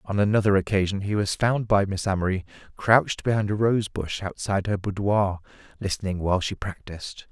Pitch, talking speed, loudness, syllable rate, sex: 100 Hz, 170 wpm, -24 LUFS, 5.6 syllables/s, male